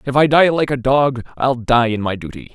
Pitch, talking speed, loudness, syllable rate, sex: 125 Hz, 260 wpm, -16 LUFS, 5.3 syllables/s, male